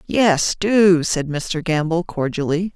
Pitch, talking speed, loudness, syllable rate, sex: 170 Hz, 130 wpm, -18 LUFS, 3.5 syllables/s, female